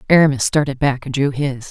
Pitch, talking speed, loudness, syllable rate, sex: 135 Hz, 210 wpm, -17 LUFS, 5.9 syllables/s, female